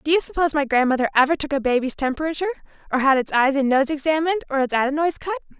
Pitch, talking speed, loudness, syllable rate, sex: 290 Hz, 225 wpm, -21 LUFS, 7.6 syllables/s, female